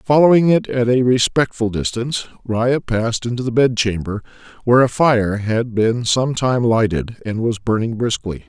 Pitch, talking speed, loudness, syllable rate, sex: 115 Hz, 165 wpm, -17 LUFS, 5.1 syllables/s, male